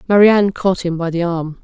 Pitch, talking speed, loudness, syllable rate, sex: 180 Hz, 255 wpm, -15 LUFS, 6.2 syllables/s, female